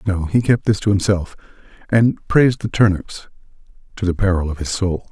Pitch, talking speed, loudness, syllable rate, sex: 100 Hz, 190 wpm, -18 LUFS, 5.3 syllables/s, male